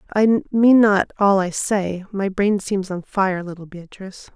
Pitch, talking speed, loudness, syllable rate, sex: 195 Hz, 165 wpm, -19 LUFS, 4.2 syllables/s, female